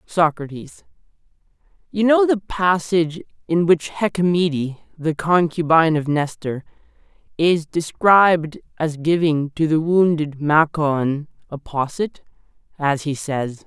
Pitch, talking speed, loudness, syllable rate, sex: 160 Hz, 110 wpm, -19 LUFS, 4.0 syllables/s, male